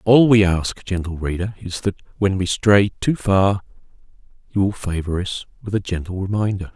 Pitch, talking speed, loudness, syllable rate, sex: 95 Hz, 180 wpm, -20 LUFS, 4.9 syllables/s, male